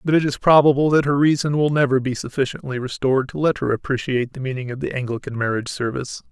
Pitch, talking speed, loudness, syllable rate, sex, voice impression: 135 Hz, 220 wpm, -20 LUFS, 6.8 syllables/s, male, very masculine, middle-aged, very thick, slightly relaxed, weak, slightly dark, slightly soft, slightly muffled, fluent, slightly raspy, cool, intellectual, slightly refreshing, sincere, calm, mature, very friendly, very reassuring, very unique, slightly elegant, wild, slightly sweet, lively, kind, slightly intense